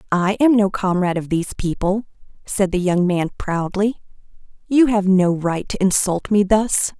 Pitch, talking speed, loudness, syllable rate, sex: 195 Hz, 170 wpm, -19 LUFS, 4.8 syllables/s, female